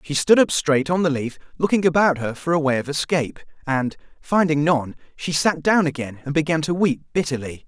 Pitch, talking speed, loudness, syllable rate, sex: 150 Hz, 210 wpm, -21 LUFS, 5.5 syllables/s, male